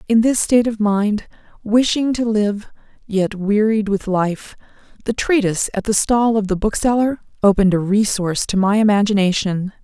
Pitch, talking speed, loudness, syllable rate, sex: 210 Hz, 160 wpm, -17 LUFS, 5.0 syllables/s, female